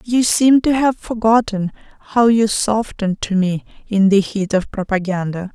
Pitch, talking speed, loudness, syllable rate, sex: 210 Hz, 160 wpm, -17 LUFS, 4.6 syllables/s, female